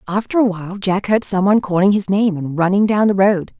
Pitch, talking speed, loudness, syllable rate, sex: 195 Hz, 250 wpm, -16 LUFS, 5.9 syllables/s, female